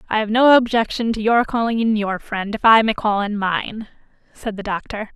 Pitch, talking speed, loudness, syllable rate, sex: 215 Hz, 220 wpm, -18 LUFS, 5.1 syllables/s, female